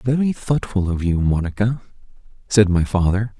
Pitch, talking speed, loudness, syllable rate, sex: 105 Hz, 140 wpm, -19 LUFS, 4.9 syllables/s, male